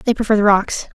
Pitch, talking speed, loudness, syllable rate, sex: 210 Hz, 240 wpm, -16 LUFS, 5.8 syllables/s, female